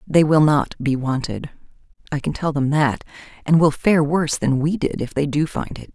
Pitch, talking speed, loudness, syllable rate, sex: 150 Hz, 220 wpm, -19 LUFS, 5.0 syllables/s, female